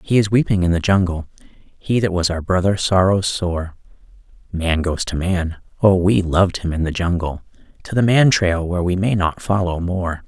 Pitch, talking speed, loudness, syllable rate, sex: 90 Hz, 200 wpm, -18 LUFS, 4.5 syllables/s, male